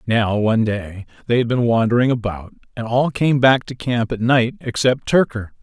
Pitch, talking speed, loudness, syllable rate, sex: 120 Hz, 190 wpm, -18 LUFS, 4.9 syllables/s, male